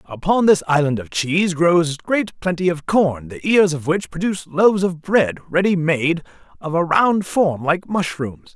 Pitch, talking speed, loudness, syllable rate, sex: 170 Hz, 180 wpm, -18 LUFS, 4.4 syllables/s, male